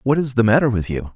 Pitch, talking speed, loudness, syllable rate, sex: 120 Hz, 315 wpm, -18 LUFS, 6.7 syllables/s, male